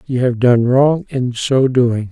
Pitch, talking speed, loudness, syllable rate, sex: 125 Hz, 200 wpm, -15 LUFS, 3.6 syllables/s, male